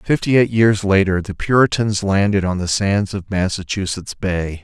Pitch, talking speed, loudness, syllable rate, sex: 100 Hz, 170 wpm, -17 LUFS, 4.6 syllables/s, male